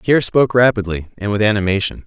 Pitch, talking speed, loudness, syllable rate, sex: 110 Hz, 175 wpm, -16 LUFS, 6.9 syllables/s, male